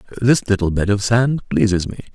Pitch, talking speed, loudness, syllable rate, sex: 100 Hz, 195 wpm, -17 LUFS, 5.0 syllables/s, male